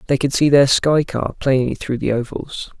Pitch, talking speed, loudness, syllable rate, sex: 135 Hz, 215 wpm, -17 LUFS, 4.8 syllables/s, male